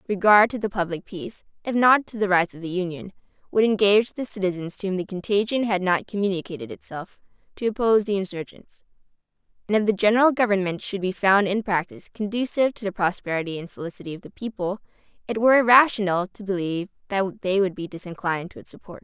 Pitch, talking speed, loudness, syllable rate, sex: 195 Hz, 190 wpm, -23 LUFS, 6.5 syllables/s, female